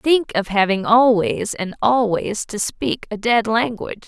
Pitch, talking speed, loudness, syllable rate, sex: 220 Hz, 130 wpm, -18 LUFS, 4.2 syllables/s, female